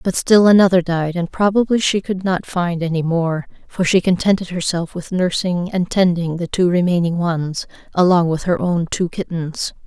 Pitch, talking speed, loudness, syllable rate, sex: 175 Hz, 185 wpm, -17 LUFS, 4.8 syllables/s, female